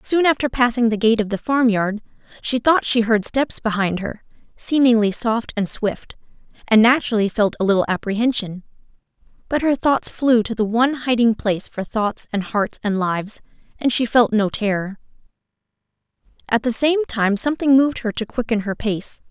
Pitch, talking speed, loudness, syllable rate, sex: 230 Hz, 175 wpm, -19 LUFS, 5.2 syllables/s, female